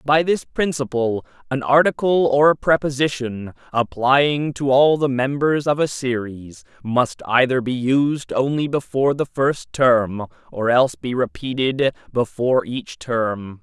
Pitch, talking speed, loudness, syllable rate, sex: 130 Hz, 140 wpm, -19 LUFS, 4.1 syllables/s, male